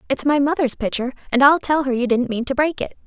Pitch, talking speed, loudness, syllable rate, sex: 270 Hz, 275 wpm, -19 LUFS, 6.1 syllables/s, female